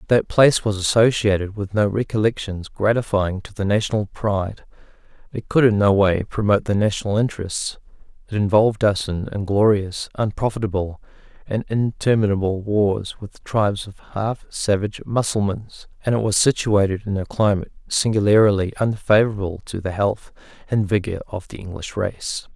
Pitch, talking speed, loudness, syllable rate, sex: 105 Hz, 145 wpm, -20 LUFS, 5.2 syllables/s, male